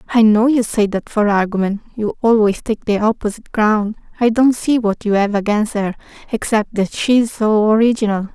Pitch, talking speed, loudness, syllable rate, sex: 215 Hz, 180 wpm, -16 LUFS, 5.1 syllables/s, female